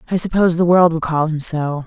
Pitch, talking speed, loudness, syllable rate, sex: 165 Hz, 255 wpm, -16 LUFS, 6.1 syllables/s, female